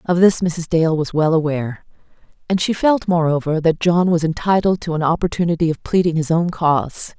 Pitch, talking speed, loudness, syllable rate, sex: 165 Hz, 190 wpm, -18 LUFS, 5.4 syllables/s, female